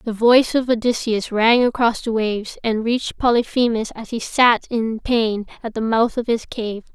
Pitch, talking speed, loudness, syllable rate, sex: 230 Hz, 190 wpm, -19 LUFS, 4.8 syllables/s, female